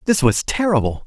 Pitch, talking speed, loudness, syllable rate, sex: 155 Hz, 170 wpm, -18 LUFS, 5.6 syllables/s, male